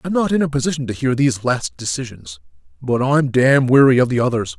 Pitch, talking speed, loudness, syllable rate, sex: 125 Hz, 220 wpm, -17 LUFS, 5.9 syllables/s, male